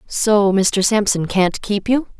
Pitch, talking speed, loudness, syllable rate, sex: 205 Hz, 165 wpm, -17 LUFS, 3.5 syllables/s, female